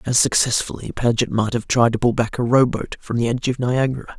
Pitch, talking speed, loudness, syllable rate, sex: 120 Hz, 245 wpm, -19 LUFS, 5.9 syllables/s, male